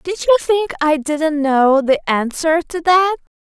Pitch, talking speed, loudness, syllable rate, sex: 315 Hz, 175 wpm, -16 LUFS, 3.8 syllables/s, female